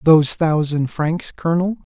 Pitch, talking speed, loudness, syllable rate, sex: 160 Hz, 125 wpm, -19 LUFS, 4.9 syllables/s, male